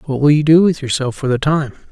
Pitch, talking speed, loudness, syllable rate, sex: 145 Hz, 285 wpm, -15 LUFS, 6.2 syllables/s, male